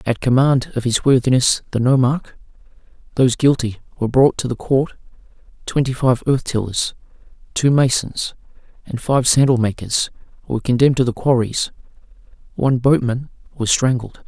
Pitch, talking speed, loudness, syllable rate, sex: 125 Hz, 140 wpm, -18 LUFS, 5.3 syllables/s, male